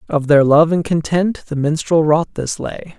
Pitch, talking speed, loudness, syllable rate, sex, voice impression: 160 Hz, 200 wpm, -16 LUFS, 4.3 syllables/s, male, masculine, adult-like, refreshing, sincere, slightly lively